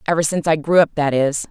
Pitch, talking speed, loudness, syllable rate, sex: 155 Hz, 280 wpm, -17 LUFS, 6.8 syllables/s, female